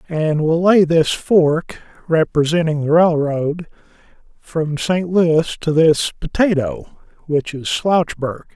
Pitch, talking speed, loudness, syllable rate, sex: 160 Hz, 120 wpm, -17 LUFS, 3.0 syllables/s, male